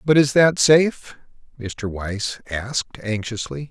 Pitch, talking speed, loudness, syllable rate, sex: 120 Hz, 130 wpm, -20 LUFS, 3.9 syllables/s, male